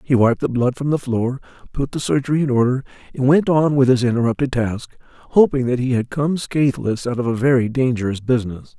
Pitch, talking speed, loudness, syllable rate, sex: 125 Hz, 210 wpm, -18 LUFS, 5.7 syllables/s, male